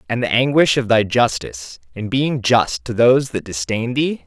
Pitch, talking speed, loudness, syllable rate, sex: 120 Hz, 195 wpm, -17 LUFS, 4.8 syllables/s, male